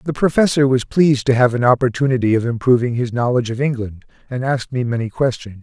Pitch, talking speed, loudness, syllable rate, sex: 125 Hz, 205 wpm, -17 LUFS, 6.5 syllables/s, male